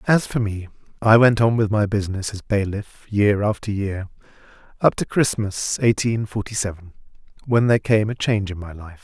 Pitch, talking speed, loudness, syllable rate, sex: 105 Hz, 185 wpm, -20 LUFS, 5.2 syllables/s, male